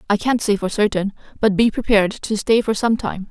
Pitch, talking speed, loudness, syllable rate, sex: 210 Hz, 235 wpm, -19 LUFS, 5.6 syllables/s, female